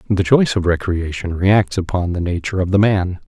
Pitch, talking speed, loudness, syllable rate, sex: 95 Hz, 200 wpm, -17 LUFS, 5.6 syllables/s, male